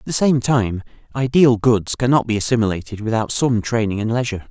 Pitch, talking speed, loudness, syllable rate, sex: 115 Hz, 185 wpm, -18 LUFS, 5.8 syllables/s, male